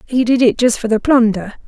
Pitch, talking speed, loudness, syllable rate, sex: 235 Hz, 250 wpm, -14 LUFS, 5.7 syllables/s, female